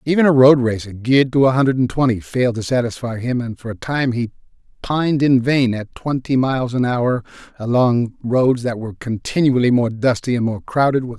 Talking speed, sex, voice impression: 215 wpm, male, masculine, middle-aged, thick, tensed, slightly powerful, calm, mature, slightly friendly, reassuring, wild, kind, slightly sharp